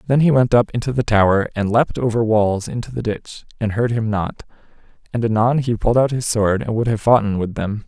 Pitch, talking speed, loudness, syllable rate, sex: 115 Hz, 235 wpm, -18 LUFS, 5.6 syllables/s, male